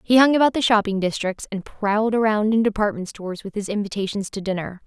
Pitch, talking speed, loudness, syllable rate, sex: 210 Hz, 210 wpm, -21 LUFS, 6.1 syllables/s, female